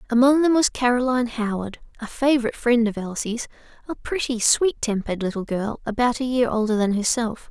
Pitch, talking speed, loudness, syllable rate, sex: 235 Hz, 175 wpm, -22 LUFS, 5.7 syllables/s, female